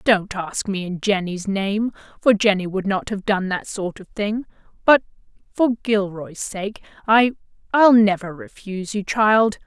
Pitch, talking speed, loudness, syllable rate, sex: 205 Hz, 155 wpm, -20 LUFS, 4.2 syllables/s, female